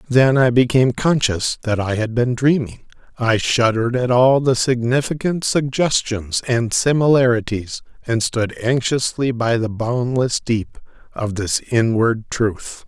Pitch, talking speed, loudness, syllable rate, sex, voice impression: 120 Hz, 135 wpm, -18 LUFS, 4.1 syllables/s, male, masculine, middle-aged, bright, halting, calm, friendly, slightly wild, kind, slightly modest